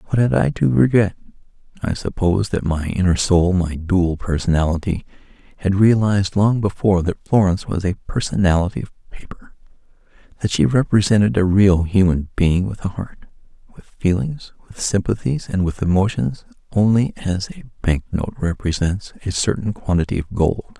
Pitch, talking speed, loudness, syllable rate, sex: 95 Hz, 145 wpm, -19 LUFS, 5.2 syllables/s, male